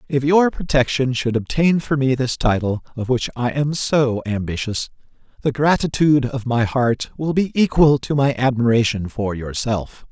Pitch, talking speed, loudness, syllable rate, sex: 130 Hz, 165 wpm, -19 LUFS, 4.6 syllables/s, male